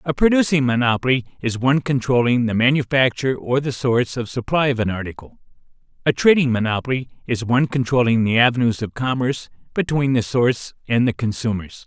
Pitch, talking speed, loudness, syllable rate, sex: 125 Hz, 160 wpm, -19 LUFS, 6.1 syllables/s, male